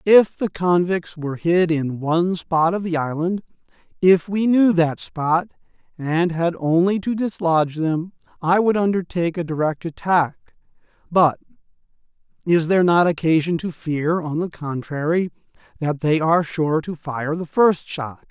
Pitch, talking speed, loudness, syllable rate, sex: 170 Hz, 155 wpm, -20 LUFS, 4.4 syllables/s, male